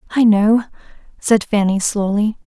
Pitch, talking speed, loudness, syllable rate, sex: 215 Hz, 120 wpm, -16 LUFS, 4.6 syllables/s, female